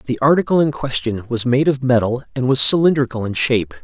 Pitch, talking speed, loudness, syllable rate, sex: 130 Hz, 205 wpm, -17 LUFS, 6.1 syllables/s, male